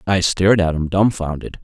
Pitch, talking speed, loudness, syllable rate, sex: 90 Hz, 185 wpm, -17 LUFS, 5.4 syllables/s, male